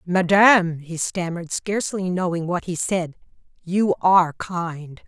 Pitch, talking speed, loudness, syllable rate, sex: 180 Hz, 130 wpm, -21 LUFS, 4.4 syllables/s, female